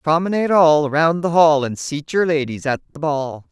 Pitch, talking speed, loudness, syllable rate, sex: 155 Hz, 205 wpm, -17 LUFS, 5.2 syllables/s, female